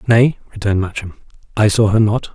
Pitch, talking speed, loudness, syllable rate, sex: 105 Hz, 180 wpm, -16 LUFS, 5.9 syllables/s, male